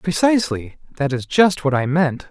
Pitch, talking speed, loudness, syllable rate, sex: 155 Hz, 185 wpm, -18 LUFS, 4.9 syllables/s, male